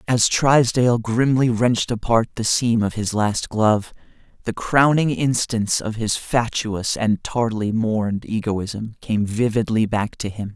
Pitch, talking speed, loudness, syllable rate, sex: 115 Hz, 150 wpm, -20 LUFS, 4.3 syllables/s, male